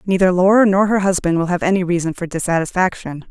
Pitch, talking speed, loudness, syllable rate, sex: 180 Hz, 200 wpm, -16 LUFS, 6.3 syllables/s, female